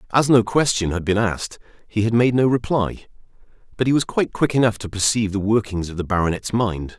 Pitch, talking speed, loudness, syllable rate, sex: 110 Hz, 215 wpm, -20 LUFS, 6.1 syllables/s, male